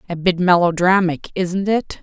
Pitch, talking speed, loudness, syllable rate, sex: 180 Hz, 150 wpm, -17 LUFS, 5.0 syllables/s, female